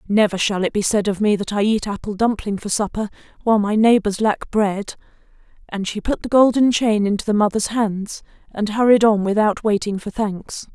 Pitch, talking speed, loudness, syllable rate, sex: 210 Hz, 200 wpm, -19 LUFS, 5.2 syllables/s, female